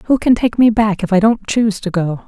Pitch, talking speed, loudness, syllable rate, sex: 210 Hz, 290 wpm, -14 LUFS, 5.4 syllables/s, female